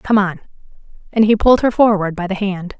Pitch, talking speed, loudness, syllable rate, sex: 200 Hz, 215 wpm, -15 LUFS, 5.9 syllables/s, female